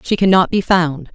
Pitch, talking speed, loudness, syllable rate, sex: 175 Hz, 210 wpm, -15 LUFS, 4.8 syllables/s, female